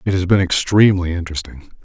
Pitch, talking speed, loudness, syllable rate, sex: 90 Hz, 165 wpm, -16 LUFS, 6.7 syllables/s, male